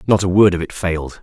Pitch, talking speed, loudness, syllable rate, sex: 90 Hz, 295 wpm, -16 LUFS, 6.4 syllables/s, male